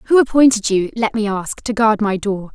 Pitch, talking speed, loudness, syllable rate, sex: 215 Hz, 235 wpm, -16 LUFS, 4.9 syllables/s, female